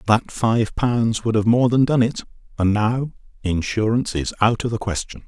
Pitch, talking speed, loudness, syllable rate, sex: 110 Hz, 180 wpm, -20 LUFS, 4.8 syllables/s, male